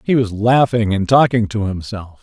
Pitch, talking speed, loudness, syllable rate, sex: 110 Hz, 190 wpm, -16 LUFS, 4.7 syllables/s, male